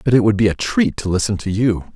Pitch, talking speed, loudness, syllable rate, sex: 110 Hz, 305 wpm, -17 LUFS, 6.3 syllables/s, male